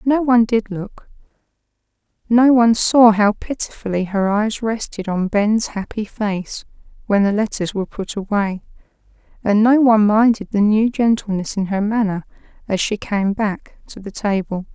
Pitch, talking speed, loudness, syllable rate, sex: 210 Hz, 160 wpm, -18 LUFS, 4.7 syllables/s, female